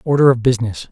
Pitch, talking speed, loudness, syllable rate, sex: 125 Hz, 195 wpm, -15 LUFS, 7.4 syllables/s, male